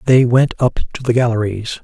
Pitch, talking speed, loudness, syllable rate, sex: 120 Hz, 195 wpm, -16 LUFS, 5.4 syllables/s, male